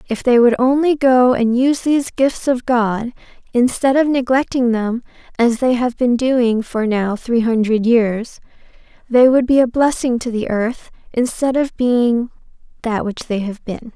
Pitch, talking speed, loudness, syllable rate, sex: 245 Hz, 170 wpm, -16 LUFS, 4.3 syllables/s, female